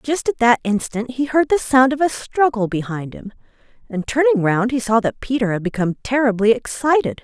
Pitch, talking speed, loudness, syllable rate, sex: 240 Hz, 200 wpm, -18 LUFS, 5.3 syllables/s, female